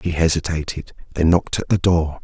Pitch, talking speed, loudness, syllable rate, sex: 85 Hz, 190 wpm, -19 LUFS, 5.6 syllables/s, male